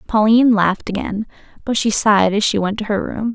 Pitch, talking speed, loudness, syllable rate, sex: 210 Hz, 215 wpm, -16 LUFS, 6.0 syllables/s, female